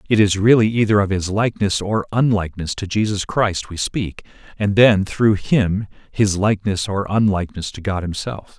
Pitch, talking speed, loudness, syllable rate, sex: 100 Hz, 175 wpm, -19 LUFS, 5.1 syllables/s, male